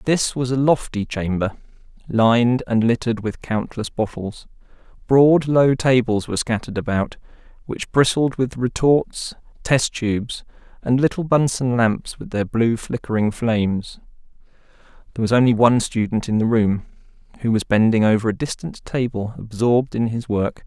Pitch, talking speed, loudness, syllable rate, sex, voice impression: 120 Hz, 150 wpm, -20 LUFS, 4.9 syllables/s, male, masculine, adult-like, cool, slightly refreshing, sincere, slightly calm